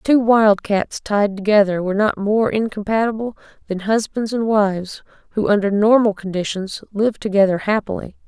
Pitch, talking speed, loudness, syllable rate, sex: 210 Hz, 140 wpm, -18 LUFS, 5.1 syllables/s, female